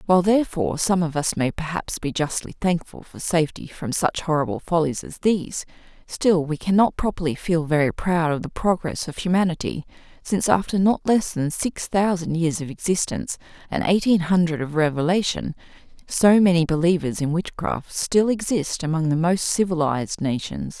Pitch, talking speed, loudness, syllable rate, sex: 170 Hz, 165 wpm, -22 LUFS, 5.2 syllables/s, female